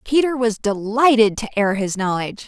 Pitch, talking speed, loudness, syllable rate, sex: 225 Hz, 170 wpm, -18 LUFS, 5.3 syllables/s, female